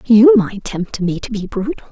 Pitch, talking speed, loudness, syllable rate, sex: 200 Hz, 220 wpm, -16 LUFS, 4.8 syllables/s, female